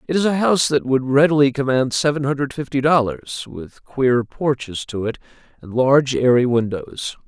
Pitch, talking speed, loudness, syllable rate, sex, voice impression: 135 Hz, 175 wpm, -19 LUFS, 5.0 syllables/s, male, very masculine, adult-like, slightly fluent, slightly refreshing, sincere, slightly friendly